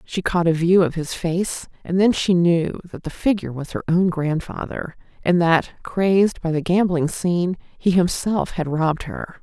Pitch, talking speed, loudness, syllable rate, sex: 175 Hz, 190 wpm, -20 LUFS, 4.6 syllables/s, female